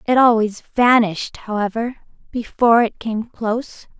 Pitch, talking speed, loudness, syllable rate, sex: 225 Hz, 120 wpm, -18 LUFS, 4.7 syllables/s, female